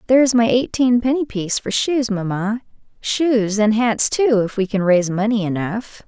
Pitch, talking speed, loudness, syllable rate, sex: 225 Hz, 180 wpm, -18 LUFS, 4.9 syllables/s, female